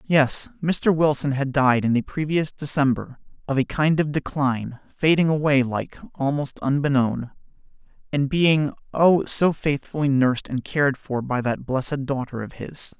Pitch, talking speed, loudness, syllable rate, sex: 140 Hz, 155 wpm, -22 LUFS, 4.5 syllables/s, male